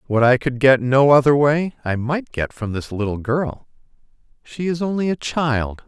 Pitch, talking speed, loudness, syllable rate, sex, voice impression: 135 Hz, 195 wpm, -19 LUFS, 4.5 syllables/s, male, masculine, adult-like, slightly thick, slightly intellectual, slightly calm